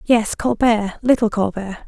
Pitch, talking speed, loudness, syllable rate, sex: 220 Hz, 130 wpm, -18 LUFS, 4.4 syllables/s, female